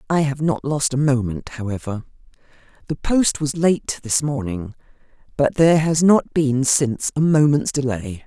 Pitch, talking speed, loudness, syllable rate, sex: 140 Hz, 160 wpm, -19 LUFS, 4.6 syllables/s, female